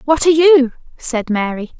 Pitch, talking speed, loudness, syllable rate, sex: 270 Hz, 170 wpm, -14 LUFS, 5.1 syllables/s, female